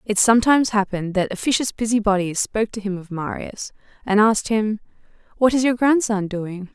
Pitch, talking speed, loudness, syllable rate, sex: 215 Hz, 170 wpm, -20 LUFS, 5.8 syllables/s, female